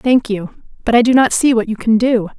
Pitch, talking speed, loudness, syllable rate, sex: 230 Hz, 275 wpm, -14 LUFS, 5.3 syllables/s, female